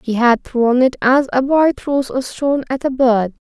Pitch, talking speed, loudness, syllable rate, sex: 255 Hz, 225 wpm, -16 LUFS, 4.6 syllables/s, female